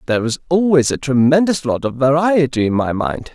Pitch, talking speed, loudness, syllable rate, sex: 145 Hz, 195 wpm, -16 LUFS, 5.5 syllables/s, male